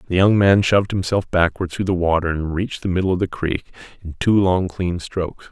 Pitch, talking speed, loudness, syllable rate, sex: 90 Hz, 230 wpm, -19 LUFS, 5.8 syllables/s, male